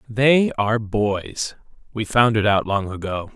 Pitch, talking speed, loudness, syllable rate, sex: 110 Hz, 160 wpm, -20 LUFS, 4.0 syllables/s, male